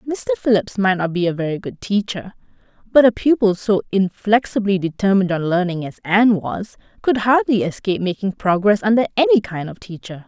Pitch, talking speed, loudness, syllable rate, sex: 205 Hz, 175 wpm, -18 LUFS, 5.5 syllables/s, female